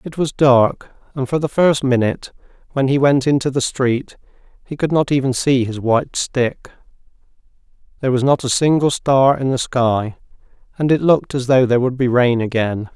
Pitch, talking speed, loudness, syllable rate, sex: 130 Hz, 190 wpm, -17 LUFS, 5.1 syllables/s, male